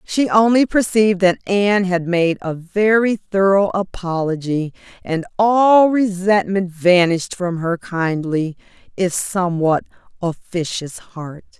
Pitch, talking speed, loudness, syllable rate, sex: 185 Hz, 115 wpm, -17 LUFS, 4.0 syllables/s, female